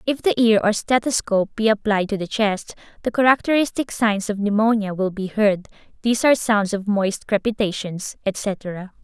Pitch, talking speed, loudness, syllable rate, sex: 210 Hz, 165 wpm, -20 LUFS, 5.0 syllables/s, female